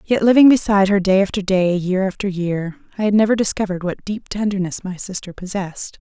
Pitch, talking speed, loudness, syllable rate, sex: 195 Hz, 195 wpm, -18 LUFS, 5.9 syllables/s, female